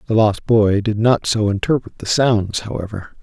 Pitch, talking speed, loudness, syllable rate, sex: 110 Hz, 185 wpm, -17 LUFS, 4.6 syllables/s, male